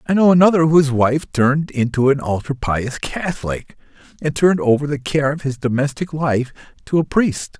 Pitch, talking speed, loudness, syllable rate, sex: 145 Hz, 180 wpm, -18 LUFS, 5.2 syllables/s, male